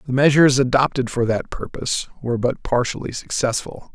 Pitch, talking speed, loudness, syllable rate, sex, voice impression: 130 Hz, 150 wpm, -20 LUFS, 5.8 syllables/s, male, very masculine, very adult-like, slightly old, thick, slightly relaxed, slightly weak, slightly dark, slightly hard, muffled, slightly halting, raspy, slightly cool, intellectual, sincere, calm, very mature, slightly friendly, slightly reassuring, very unique, slightly elegant, wild, slightly lively, slightly kind, slightly modest